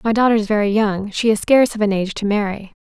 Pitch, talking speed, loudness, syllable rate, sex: 210 Hz, 255 wpm, -17 LUFS, 6.8 syllables/s, female